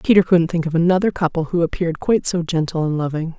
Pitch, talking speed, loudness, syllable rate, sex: 170 Hz, 230 wpm, -19 LUFS, 6.7 syllables/s, female